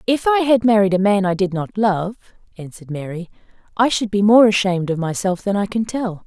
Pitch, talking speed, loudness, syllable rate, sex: 200 Hz, 220 wpm, -17 LUFS, 5.8 syllables/s, female